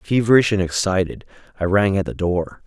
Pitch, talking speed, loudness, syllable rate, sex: 100 Hz, 180 wpm, -19 LUFS, 5.3 syllables/s, male